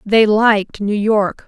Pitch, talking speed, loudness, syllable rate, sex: 210 Hz, 165 wpm, -15 LUFS, 3.7 syllables/s, female